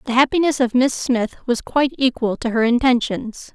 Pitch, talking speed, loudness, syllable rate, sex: 250 Hz, 185 wpm, -19 LUFS, 5.2 syllables/s, female